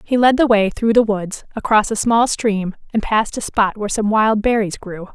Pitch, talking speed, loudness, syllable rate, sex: 215 Hz, 235 wpm, -17 LUFS, 4.9 syllables/s, female